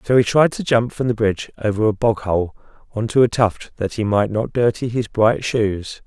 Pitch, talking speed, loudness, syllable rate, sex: 110 Hz, 235 wpm, -19 LUFS, 5.0 syllables/s, male